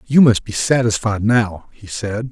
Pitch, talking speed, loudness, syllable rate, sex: 110 Hz, 180 wpm, -17 LUFS, 4.1 syllables/s, male